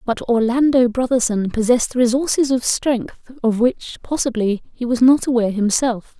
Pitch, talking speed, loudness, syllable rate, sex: 240 Hz, 145 wpm, -18 LUFS, 4.8 syllables/s, female